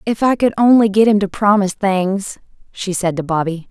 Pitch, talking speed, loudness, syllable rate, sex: 200 Hz, 210 wpm, -15 LUFS, 5.3 syllables/s, female